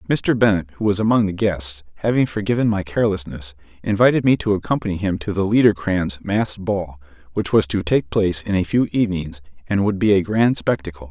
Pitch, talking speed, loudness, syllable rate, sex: 95 Hz, 195 wpm, -19 LUFS, 5.9 syllables/s, male